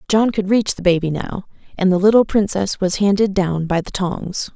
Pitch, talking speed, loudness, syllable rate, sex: 190 Hz, 210 wpm, -18 LUFS, 4.9 syllables/s, female